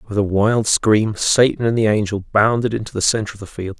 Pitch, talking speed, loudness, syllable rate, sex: 105 Hz, 235 wpm, -17 LUFS, 5.5 syllables/s, male